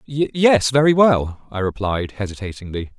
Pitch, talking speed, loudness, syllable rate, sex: 120 Hz, 120 wpm, -18 LUFS, 4.3 syllables/s, male